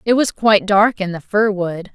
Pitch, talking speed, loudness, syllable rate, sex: 200 Hz, 245 wpm, -16 LUFS, 5.0 syllables/s, female